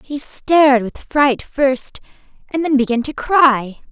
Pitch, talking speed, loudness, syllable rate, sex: 270 Hz, 155 wpm, -16 LUFS, 3.7 syllables/s, female